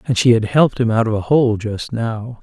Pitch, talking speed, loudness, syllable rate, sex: 115 Hz, 270 wpm, -17 LUFS, 5.3 syllables/s, male